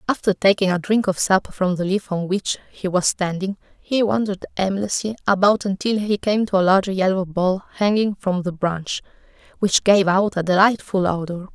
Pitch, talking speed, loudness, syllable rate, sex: 195 Hz, 185 wpm, -20 LUFS, 5.1 syllables/s, female